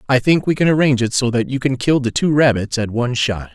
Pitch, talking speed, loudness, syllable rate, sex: 125 Hz, 285 wpm, -17 LUFS, 6.3 syllables/s, male